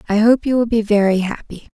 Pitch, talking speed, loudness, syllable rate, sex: 215 Hz, 240 wpm, -16 LUFS, 5.9 syllables/s, female